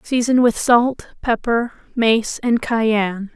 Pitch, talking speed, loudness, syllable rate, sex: 230 Hz, 125 wpm, -18 LUFS, 3.3 syllables/s, female